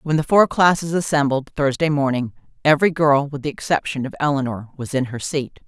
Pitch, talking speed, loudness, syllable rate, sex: 145 Hz, 190 wpm, -19 LUFS, 5.7 syllables/s, female